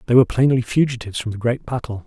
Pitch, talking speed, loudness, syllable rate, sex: 120 Hz, 235 wpm, -20 LUFS, 7.4 syllables/s, male